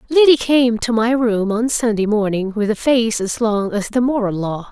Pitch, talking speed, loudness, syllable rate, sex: 225 Hz, 215 wpm, -17 LUFS, 4.7 syllables/s, female